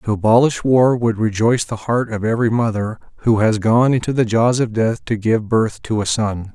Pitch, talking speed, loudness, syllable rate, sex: 115 Hz, 220 wpm, -17 LUFS, 5.1 syllables/s, male